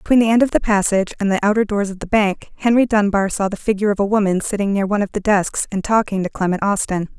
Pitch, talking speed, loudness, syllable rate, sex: 200 Hz, 265 wpm, -18 LUFS, 6.6 syllables/s, female